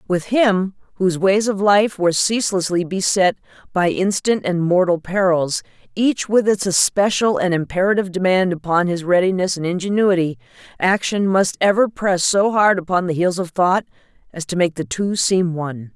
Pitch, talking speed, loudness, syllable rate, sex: 185 Hz, 165 wpm, -18 LUFS, 5.0 syllables/s, female